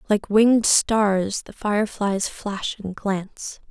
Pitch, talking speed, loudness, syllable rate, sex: 205 Hz, 145 wpm, -21 LUFS, 3.3 syllables/s, female